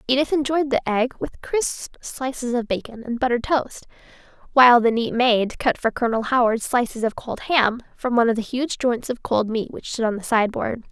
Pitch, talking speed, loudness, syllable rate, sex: 245 Hz, 210 wpm, -21 LUFS, 5.4 syllables/s, female